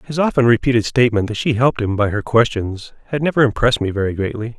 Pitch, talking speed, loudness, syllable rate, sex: 120 Hz, 220 wpm, -17 LUFS, 6.8 syllables/s, male